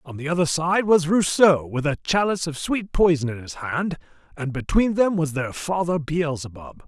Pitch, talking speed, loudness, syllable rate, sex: 160 Hz, 190 wpm, -22 LUFS, 4.9 syllables/s, male